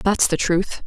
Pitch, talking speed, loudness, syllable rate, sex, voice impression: 185 Hz, 210 wpm, -20 LUFS, 3.9 syllables/s, female, very feminine, slightly young, very adult-like, slightly thin, tensed, slightly powerful, bright, hard, slightly muffled, fluent, slightly raspy, cool, intellectual, slightly refreshing, very sincere, calm, friendly, reassuring, slightly unique, elegant, wild, slightly sweet, slightly lively, strict, intense, slightly sharp, slightly light